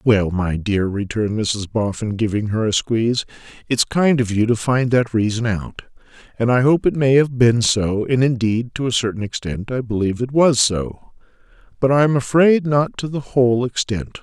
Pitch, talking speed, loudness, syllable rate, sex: 120 Hz, 200 wpm, -18 LUFS, 4.9 syllables/s, male